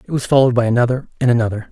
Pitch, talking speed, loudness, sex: 120 Hz, 245 wpm, -16 LUFS, male